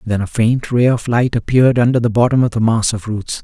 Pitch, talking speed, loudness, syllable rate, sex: 115 Hz, 260 wpm, -15 LUFS, 5.7 syllables/s, male